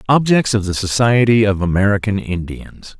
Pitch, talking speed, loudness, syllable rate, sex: 105 Hz, 140 wpm, -15 LUFS, 5.0 syllables/s, male